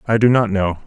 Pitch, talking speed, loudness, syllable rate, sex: 105 Hz, 275 wpm, -16 LUFS, 5.4 syllables/s, male